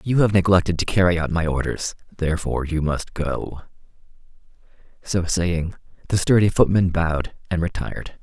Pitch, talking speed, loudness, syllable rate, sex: 85 Hz, 145 wpm, -21 LUFS, 5.3 syllables/s, male